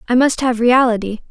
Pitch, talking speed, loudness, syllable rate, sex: 240 Hz, 185 wpm, -15 LUFS, 5.7 syllables/s, female